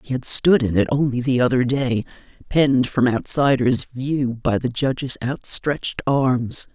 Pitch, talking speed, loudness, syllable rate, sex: 130 Hz, 160 wpm, -20 LUFS, 4.3 syllables/s, female